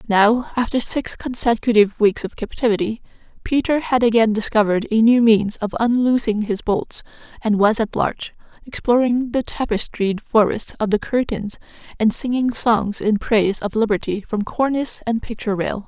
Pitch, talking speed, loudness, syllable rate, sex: 225 Hz, 155 wpm, -19 LUFS, 5.1 syllables/s, female